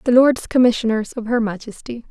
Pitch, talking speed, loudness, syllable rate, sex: 235 Hz, 170 wpm, -18 LUFS, 5.6 syllables/s, female